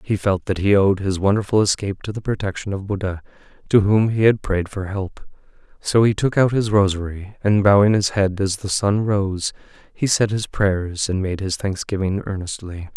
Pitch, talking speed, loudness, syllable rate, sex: 100 Hz, 200 wpm, -20 LUFS, 5.0 syllables/s, male